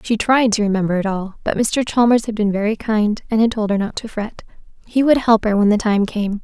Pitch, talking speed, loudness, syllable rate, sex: 215 Hz, 260 wpm, -17 LUFS, 5.6 syllables/s, female